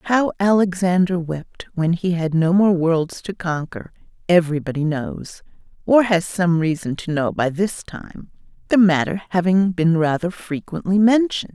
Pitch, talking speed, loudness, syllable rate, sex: 180 Hz, 145 wpm, -19 LUFS, 4.5 syllables/s, female